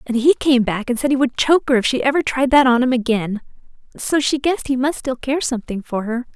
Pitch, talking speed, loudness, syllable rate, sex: 255 Hz, 265 wpm, -18 LUFS, 6.0 syllables/s, female